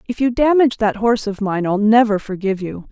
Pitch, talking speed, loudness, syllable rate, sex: 215 Hz, 225 wpm, -17 LUFS, 6.1 syllables/s, female